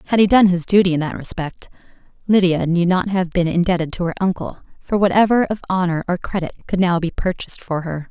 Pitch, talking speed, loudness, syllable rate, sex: 180 Hz, 215 wpm, -18 LUFS, 5.9 syllables/s, female